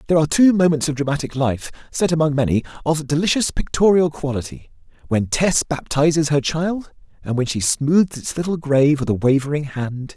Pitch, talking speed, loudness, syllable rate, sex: 145 Hz, 175 wpm, -19 LUFS, 5.5 syllables/s, male